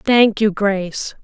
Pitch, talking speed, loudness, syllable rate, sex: 205 Hz, 145 wpm, -17 LUFS, 3.7 syllables/s, female